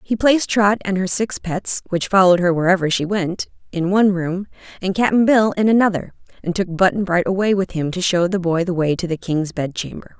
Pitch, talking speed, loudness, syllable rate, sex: 185 Hz, 210 wpm, -18 LUFS, 5.5 syllables/s, female